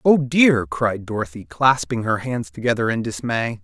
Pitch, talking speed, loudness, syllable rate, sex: 115 Hz, 165 wpm, -20 LUFS, 4.5 syllables/s, male